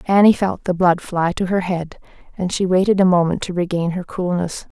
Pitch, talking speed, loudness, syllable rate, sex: 180 Hz, 215 wpm, -18 LUFS, 5.2 syllables/s, female